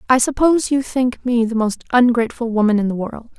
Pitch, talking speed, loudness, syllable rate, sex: 240 Hz, 210 wpm, -17 LUFS, 5.8 syllables/s, female